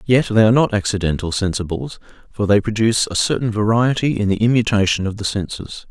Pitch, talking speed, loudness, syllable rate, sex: 105 Hz, 185 wpm, -18 LUFS, 6.1 syllables/s, male